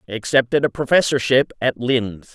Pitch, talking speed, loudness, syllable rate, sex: 125 Hz, 130 wpm, -18 LUFS, 4.7 syllables/s, male